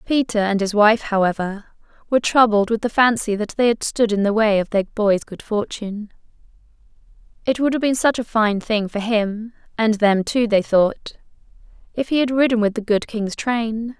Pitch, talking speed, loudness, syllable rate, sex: 220 Hz, 195 wpm, -19 LUFS, 4.9 syllables/s, female